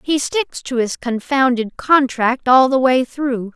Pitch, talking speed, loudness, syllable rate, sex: 255 Hz, 170 wpm, -17 LUFS, 3.8 syllables/s, female